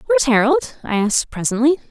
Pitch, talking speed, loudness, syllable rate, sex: 225 Hz, 155 wpm, -17 LUFS, 6.3 syllables/s, female